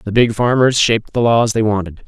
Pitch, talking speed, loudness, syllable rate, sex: 110 Hz, 230 wpm, -15 LUFS, 5.6 syllables/s, male